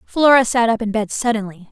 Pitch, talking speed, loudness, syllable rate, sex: 225 Hz, 210 wpm, -17 LUFS, 5.6 syllables/s, female